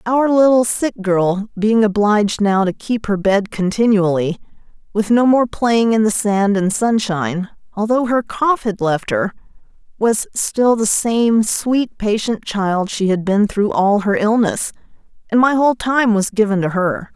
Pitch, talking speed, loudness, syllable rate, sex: 210 Hz, 170 wpm, -16 LUFS, 4.2 syllables/s, female